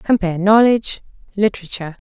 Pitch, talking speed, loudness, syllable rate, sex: 200 Hz, 85 wpm, -17 LUFS, 6.7 syllables/s, female